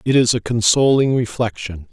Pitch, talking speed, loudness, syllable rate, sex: 115 Hz, 155 wpm, -17 LUFS, 5.0 syllables/s, male